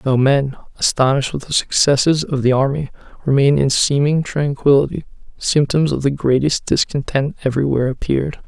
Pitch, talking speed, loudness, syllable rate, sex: 140 Hz, 150 wpm, -17 LUFS, 5.7 syllables/s, male